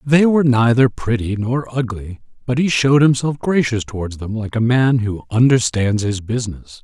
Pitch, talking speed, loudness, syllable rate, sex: 120 Hz, 175 wpm, -17 LUFS, 5.0 syllables/s, male